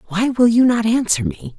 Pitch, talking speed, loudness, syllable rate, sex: 215 Hz, 225 wpm, -16 LUFS, 5.0 syllables/s, female